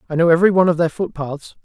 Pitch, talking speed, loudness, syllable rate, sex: 165 Hz, 255 wpm, -16 LUFS, 7.8 syllables/s, male